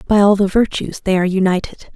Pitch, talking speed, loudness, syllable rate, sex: 195 Hz, 215 wpm, -16 LUFS, 6.3 syllables/s, female